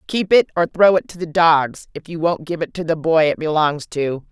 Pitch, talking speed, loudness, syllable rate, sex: 165 Hz, 265 wpm, -18 LUFS, 5.0 syllables/s, female